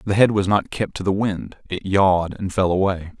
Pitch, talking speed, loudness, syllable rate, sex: 95 Hz, 245 wpm, -20 LUFS, 5.2 syllables/s, male